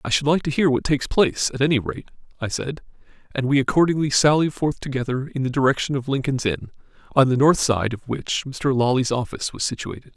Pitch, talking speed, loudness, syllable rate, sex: 135 Hz, 215 wpm, -21 LUFS, 6.1 syllables/s, male